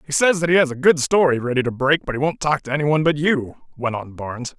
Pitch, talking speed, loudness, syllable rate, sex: 145 Hz, 290 wpm, -19 LUFS, 6.4 syllables/s, male